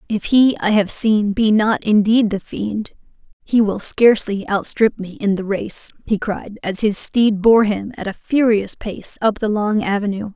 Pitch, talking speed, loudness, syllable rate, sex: 210 Hz, 190 wpm, -17 LUFS, 4.3 syllables/s, female